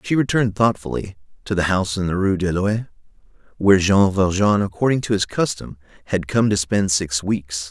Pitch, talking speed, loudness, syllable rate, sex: 95 Hz, 185 wpm, -19 LUFS, 5.4 syllables/s, male